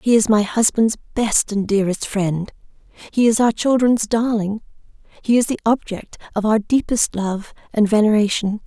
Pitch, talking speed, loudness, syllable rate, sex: 215 Hz, 160 wpm, -18 LUFS, 4.7 syllables/s, female